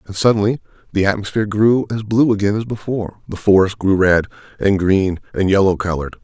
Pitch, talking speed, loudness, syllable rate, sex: 100 Hz, 185 wpm, -17 LUFS, 6.0 syllables/s, male